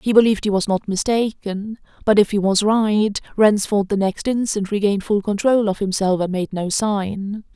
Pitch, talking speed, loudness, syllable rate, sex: 205 Hz, 185 wpm, -19 LUFS, 4.9 syllables/s, female